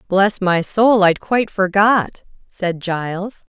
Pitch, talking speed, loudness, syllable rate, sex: 195 Hz, 135 wpm, -17 LUFS, 3.8 syllables/s, female